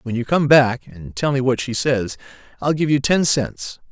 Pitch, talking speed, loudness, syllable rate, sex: 130 Hz, 230 wpm, -18 LUFS, 4.5 syllables/s, male